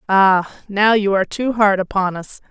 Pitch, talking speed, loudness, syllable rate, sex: 200 Hz, 190 wpm, -16 LUFS, 4.7 syllables/s, female